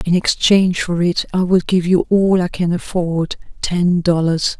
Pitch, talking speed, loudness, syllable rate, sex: 175 Hz, 170 wpm, -16 LUFS, 4.3 syllables/s, female